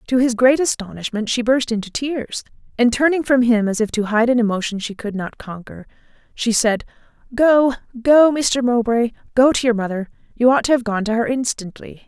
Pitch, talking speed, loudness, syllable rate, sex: 235 Hz, 190 wpm, -18 LUFS, 5.3 syllables/s, female